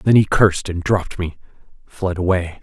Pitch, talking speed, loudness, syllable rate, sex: 90 Hz, 185 wpm, -19 LUFS, 5.2 syllables/s, male